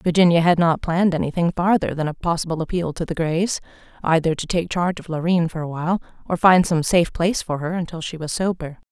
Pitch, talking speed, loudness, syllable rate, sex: 170 Hz, 220 wpm, -21 LUFS, 6.3 syllables/s, female